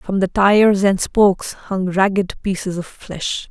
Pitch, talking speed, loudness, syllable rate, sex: 190 Hz, 170 wpm, -17 LUFS, 4.2 syllables/s, female